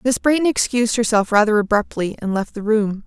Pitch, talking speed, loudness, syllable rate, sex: 220 Hz, 195 wpm, -18 LUFS, 5.8 syllables/s, female